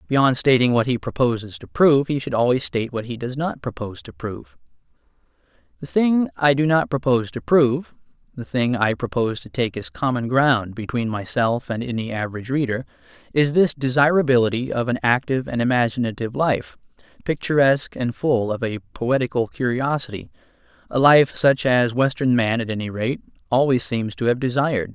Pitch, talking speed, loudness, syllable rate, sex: 125 Hz, 170 wpm, -21 LUFS, 5.6 syllables/s, male